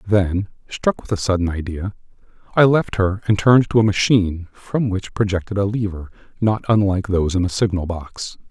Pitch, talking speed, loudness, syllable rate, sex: 100 Hz, 185 wpm, -19 LUFS, 5.4 syllables/s, male